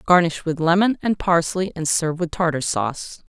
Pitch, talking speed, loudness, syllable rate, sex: 170 Hz, 180 wpm, -20 LUFS, 5.2 syllables/s, female